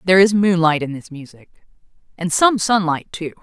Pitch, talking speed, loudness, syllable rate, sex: 175 Hz, 175 wpm, -17 LUFS, 5.4 syllables/s, female